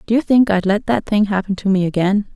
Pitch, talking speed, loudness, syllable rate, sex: 205 Hz, 280 wpm, -17 LUFS, 6.0 syllables/s, female